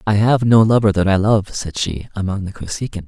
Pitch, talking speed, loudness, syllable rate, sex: 100 Hz, 235 wpm, -17 LUFS, 5.6 syllables/s, male